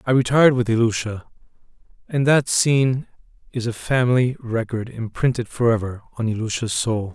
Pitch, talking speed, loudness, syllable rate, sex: 120 Hz, 145 wpm, -20 LUFS, 5.3 syllables/s, male